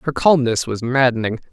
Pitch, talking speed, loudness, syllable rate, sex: 130 Hz, 160 wpm, -17 LUFS, 5.5 syllables/s, male